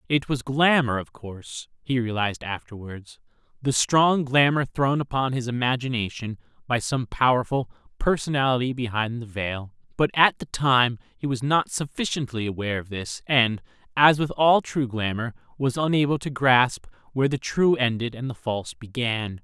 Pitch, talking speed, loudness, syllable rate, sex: 125 Hz, 155 wpm, -23 LUFS, 4.8 syllables/s, male